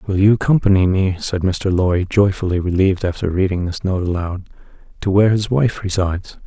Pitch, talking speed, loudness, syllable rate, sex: 95 Hz, 175 wpm, -17 LUFS, 5.7 syllables/s, male